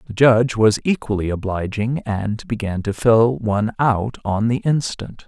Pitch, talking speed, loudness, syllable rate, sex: 110 Hz, 160 wpm, -19 LUFS, 4.5 syllables/s, male